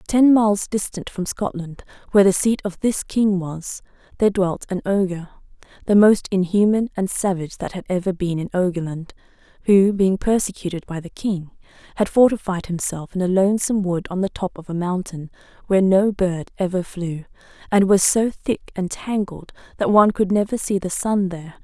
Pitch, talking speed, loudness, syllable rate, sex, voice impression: 190 Hz, 180 wpm, -20 LUFS, 5.3 syllables/s, female, feminine, adult-like, slightly relaxed, slightly powerful, soft, fluent, intellectual, calm, friendly, reassuring, elegant, modest